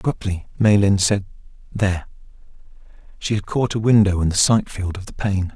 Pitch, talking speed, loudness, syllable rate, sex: 100 Hz, 175 wpm, -19 LUFS, 5.4 syllables/s, male